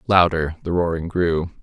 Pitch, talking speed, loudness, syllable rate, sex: 85 Hz, 145 wpm, -20 LUFS, 4.6 syllables/s, male